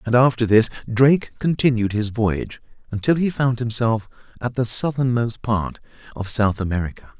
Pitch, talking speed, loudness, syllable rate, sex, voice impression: 120 Hz, 150 wpm, -20 LUFS, 5.1 syllables/s, male, masculine, adult-like, tensed, powerful, clear, fluent, intellectual, calm, friendly, reassuring, slightly wild, lively, kind